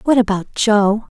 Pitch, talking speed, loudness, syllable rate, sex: 215 Hz, 150 wpm, -16 LUFS, 4.3 syllables/s, female